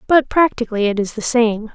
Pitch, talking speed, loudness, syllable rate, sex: 235 Hz, 205 wpm, -17 LUFS, 5.7 syllables/s, female